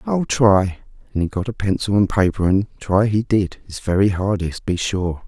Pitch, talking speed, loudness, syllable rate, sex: 100 Hz, 205 wpm, -19 LUFS, 4.8 syllables/s, male